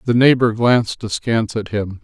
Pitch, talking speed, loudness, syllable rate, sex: 115 Hz, 175 wpm, -17 LUFS, 5.3 syllables/s, male